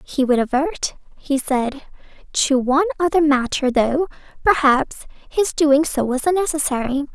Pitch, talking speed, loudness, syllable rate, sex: 285 Hz, 135 wpm, -19 LUFS, 4.5 syllables/s, female